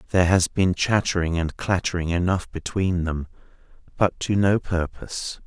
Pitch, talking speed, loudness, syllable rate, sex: 90 Hz, 145 wpm, -23 LUFS, 4.9 syllables/s, male